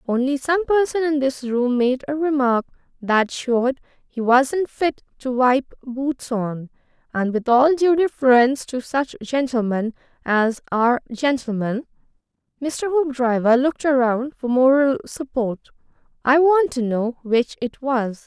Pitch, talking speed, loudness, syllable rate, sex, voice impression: 260 Hz, 140 wpm, -20 LUFS, 3.5 syllables/s, female, feminine, slightly young, cute, slightly refreshing, friendly, slightly kind